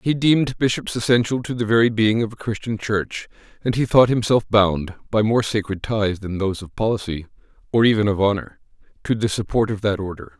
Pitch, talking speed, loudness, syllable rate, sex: 110 Hz, 200 wpm, -20 LUFS, 5.6 syllables/s, male